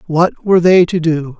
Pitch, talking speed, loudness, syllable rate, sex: 170 Hz, 215 wpm, -12 LUFS, 4.9 syllables/s, male